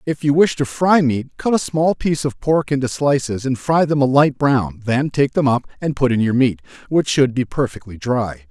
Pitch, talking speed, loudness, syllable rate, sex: 135 Hz, 240 wpm, -18 LUFS, 5.0 syllables/s, male